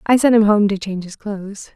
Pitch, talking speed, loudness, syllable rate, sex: 205 Hz, 275 wpm, -17 LUFS, 6.1 syllables/s, female